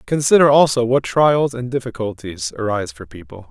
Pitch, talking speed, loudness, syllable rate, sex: 130 Hz, 155 wpm, -17 LUFS, 5.4 syllables/s, male